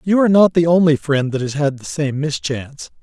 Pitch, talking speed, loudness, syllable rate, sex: 150 Hz, 240 wpm, -17 LUFS, 5.6 syllables/s, male